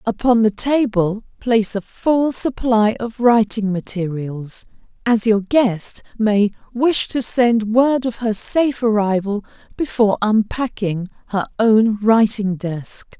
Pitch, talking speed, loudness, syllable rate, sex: 220 Hz, 125 wpm, -18 LUFS, 3.8 syllables/s, female